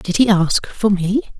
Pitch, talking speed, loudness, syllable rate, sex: 200 Hz, 215 wpm, -16 LUFS, 4.2 syllables/s, female